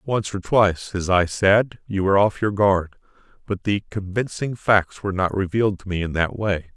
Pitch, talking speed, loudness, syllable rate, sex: 100 Hz, 205 wpm, -21 LUFS, 5.1 syllables/s, male